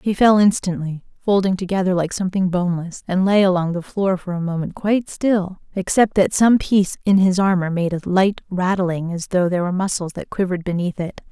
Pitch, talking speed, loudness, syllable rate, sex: 185 Hz, 200 wpm, -19 LUFS, 5.6 syllables/s, female